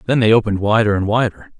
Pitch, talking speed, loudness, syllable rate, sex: 105 Hz, 225 wpm, -16 LUFS, 7.3 syllables/s, male